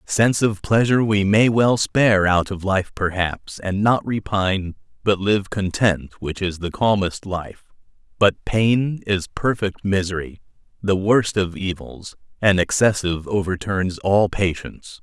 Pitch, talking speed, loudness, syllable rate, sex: 100 Hz, 145 wpm, -20 LUFS, 4.3 syllables/s, male